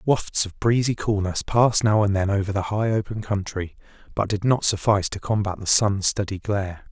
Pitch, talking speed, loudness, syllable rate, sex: 105 Hz, 200 wpm, -22 LUFS, 5.3 syllables/s, male